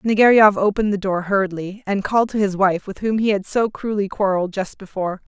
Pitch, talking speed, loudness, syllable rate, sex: 200 Hz, 215 wpm, -19 LUFS, 6.0 syllables/s, female